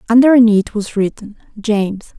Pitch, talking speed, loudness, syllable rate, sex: 215 Hz, 110 wpm, -14 LUFS, 4.6 syllables/s, female